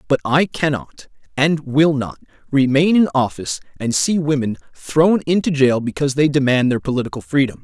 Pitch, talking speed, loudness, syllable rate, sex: 145 Hz, 165 wpm, -17 LUFS, 5.4 syllables/s, male